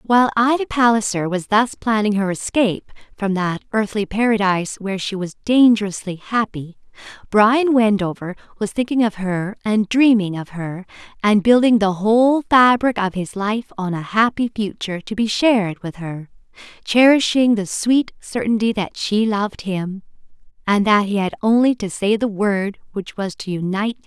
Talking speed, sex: 170 wpm, female